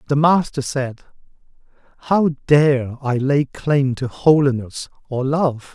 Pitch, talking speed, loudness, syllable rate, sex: 140 Hz, 125 wpm, -18 LUFS, 3.6 syllables/s, male